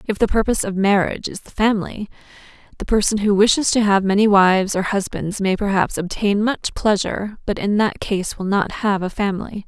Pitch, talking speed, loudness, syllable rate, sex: 200 Hz, 200 wpm, -19 LUFS, 5.6 syllables/s, female